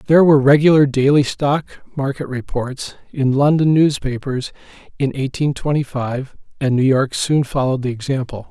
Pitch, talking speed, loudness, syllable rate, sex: 135 Hz, 150 wpm, -17 LUFS, 5.1 syllables/s, male